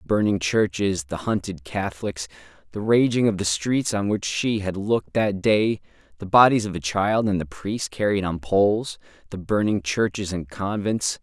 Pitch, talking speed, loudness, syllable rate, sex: 100 Hz, 180 wpm, -23 LUFS, 4.8 syllables/s, male